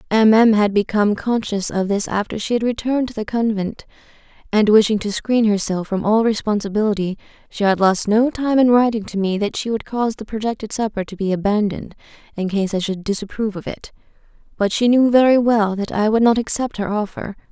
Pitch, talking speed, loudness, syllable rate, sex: 215 Hz, 205 wpm, -18 LUFS, 5.8 syllables/s, female